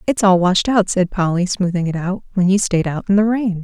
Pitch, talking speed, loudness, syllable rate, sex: 190 Hz, 265 wpm, -17 LUFS, 5.3 syllables/s, female